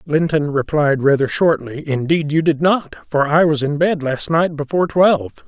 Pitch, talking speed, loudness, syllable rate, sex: 150 Hz, 185 wpm, -17 LUFS, 4.9 syllables/s, male